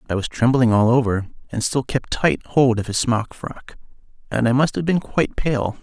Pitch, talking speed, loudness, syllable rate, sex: 120 Hz, 225 wpm, -20 LUFS, 5.1 syllables/s, male